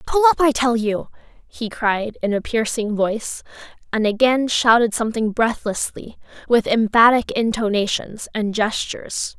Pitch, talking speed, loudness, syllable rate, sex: 230 Hz, 135 wpm, -19 LUFS, 4.4 syllables/s, female